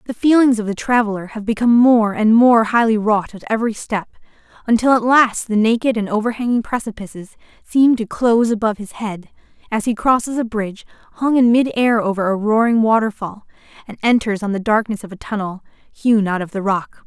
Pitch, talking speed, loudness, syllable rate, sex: 220 Hz, 190 wpm, -17 LUFS, 5.7 syllables/s, female